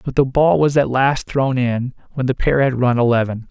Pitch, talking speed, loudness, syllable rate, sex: 130 Hz, 225 wpm, -17 LUFS, 5.0 syllables/s, male